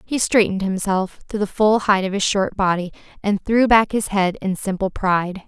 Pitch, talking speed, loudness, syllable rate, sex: 200 Hz, 210 wpm, -19 LUFS, 5.1 syllables/s, female